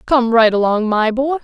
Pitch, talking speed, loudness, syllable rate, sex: 240 Hz, 210 wpm, -14 LUFS, 4.8 syllables/s, female